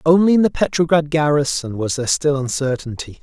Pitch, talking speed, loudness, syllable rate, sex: 145 Hz, 165 wpm, -18 LUFS, 5.8 syllables/s, male